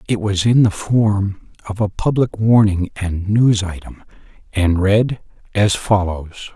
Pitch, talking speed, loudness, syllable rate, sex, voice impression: 100 Hz, 145 wpm, -17 LUFS, 3.8 syllables/s, male, very masculine, very middle-aged, thick, slightly relaxed, powerful, slightly dark, slightly soft, muffled, fluent, slightly raspy, cool, intellectual, slightly refreshing, sincere, calm, very mature, friendly, reassuring, very unique, slightly elegant, very wild, slightly sweet, lively, kind, slightly intense, slightly modest